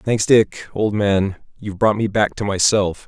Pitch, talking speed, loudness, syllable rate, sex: 105 Hz, 195 wpm, -18 LUFS, 4.3 syllables/s, male